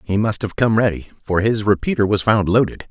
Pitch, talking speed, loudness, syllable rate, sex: 105 Hz, 225 wpm, -18 LUFS, 5.5 syllables/s, male